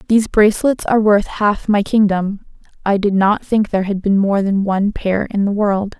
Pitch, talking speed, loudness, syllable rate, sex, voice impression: 205 Hz, 210 wpm, -16 LUFS, 5.2 syllables/s, female, feminine, adult-like, slightly weak, soft, clear, fluent, slightly cute, calm, friendly, reassuring, elegant, kind, modest